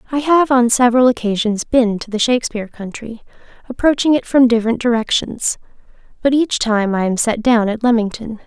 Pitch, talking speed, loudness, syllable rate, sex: 235 Hz, 170 wpm, -15 LUFS, 5.6 syllables/s, female